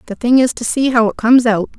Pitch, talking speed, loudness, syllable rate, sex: 235 Hz, 300 wpm, -13 LUFS, 6.5 syllables/s, female